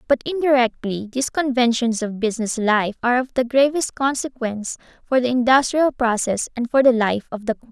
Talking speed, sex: 180 wpm, female